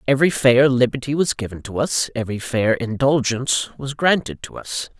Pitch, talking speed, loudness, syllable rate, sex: 125 Hz, 170 wpm, -19 LUFS, 5.3 syllables/s, male